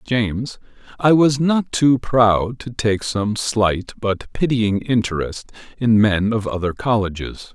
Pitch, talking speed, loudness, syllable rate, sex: 110 Hz, 145 wpm, -19 LUFS, 3.5 syllables/s, male